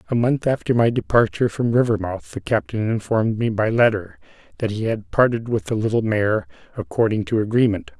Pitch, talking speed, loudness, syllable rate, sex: 110 Hz, 180 wpm, -20 LUFS, 5.7 syllables/s, male